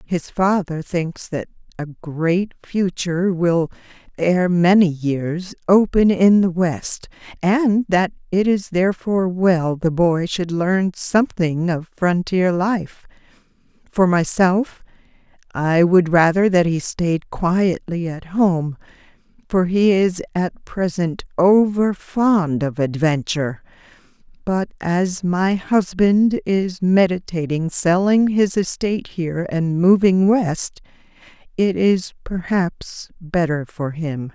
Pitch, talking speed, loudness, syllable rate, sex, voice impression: 180 Hz, 120 wpm, -18 LUFS, 3.5 syllables/s, female, very feminine, middle-aged, thin, tensed, powerful, bright, slightly soft, very clear, fluent, raspy, slightly cool, intellectual, refreshing, sincere, calm, slightly friendly, slightly reassuring, very unique, elegant, wild, slightly sweet, lively, kind, intense, sharp